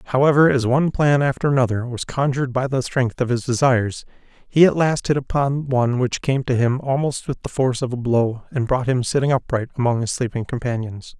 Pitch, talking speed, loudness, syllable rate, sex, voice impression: 130 Hz, 215 wpm, -20 LUFS, 5.8 syllables/s, male, masculine, adult-like, tensed, powerful, clear, fluent, cool, intellectual, refreshing, friendly, lively, kind